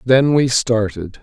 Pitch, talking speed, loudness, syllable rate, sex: 120 Hz, 145 wpm, -16 LUFS, 3.6 syllables/s, male